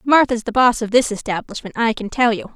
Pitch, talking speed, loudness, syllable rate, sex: 230 Hz, 235 wpm, -18 LUFS, 5.7 syllables/s, female